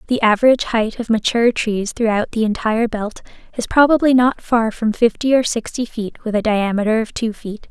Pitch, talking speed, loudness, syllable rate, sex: 225 Hz, 195 wpm, -17 LUFS, 5.4 syllables/s, female